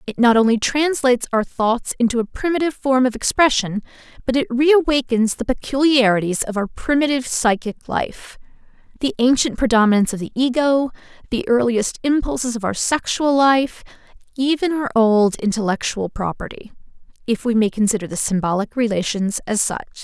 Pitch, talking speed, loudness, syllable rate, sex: 240 Hz, 145 wpm, -19 LUFS, 5.5 syllables/s, female